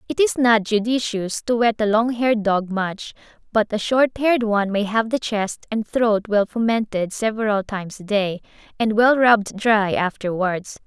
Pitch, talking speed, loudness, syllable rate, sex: 215 Hz, 180 wpm, -20 LUFS, 4.8 syllables/s, female